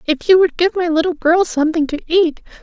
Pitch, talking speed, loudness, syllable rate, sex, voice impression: 335 Hz, 230 wpm, -15 LUFS, 5.7 syllables/s, female, very feminine, slightly young, very adult-like, very thin, tensed, powerful, bright, hard, very clear, very fluent, very cute, intellectual, refreshing, very sincere, calm, friendly, reassuring, very unique, very elegant, slightly wild, very sweet, very lively, very kind, slightly intense, modest, very light